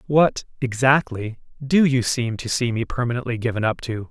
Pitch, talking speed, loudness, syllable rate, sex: 125 Hz, 145 wpm, -21 LUFS, 5.0 syllables/s, male